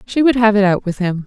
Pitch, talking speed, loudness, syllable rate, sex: 210 Hz, 330 wpm, -15 LUFS, 6.0 syllables/s, female